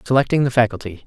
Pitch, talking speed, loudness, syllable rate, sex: 125 Hz, 170 wpm, -18 LUFS, 7.8 syllables/s, male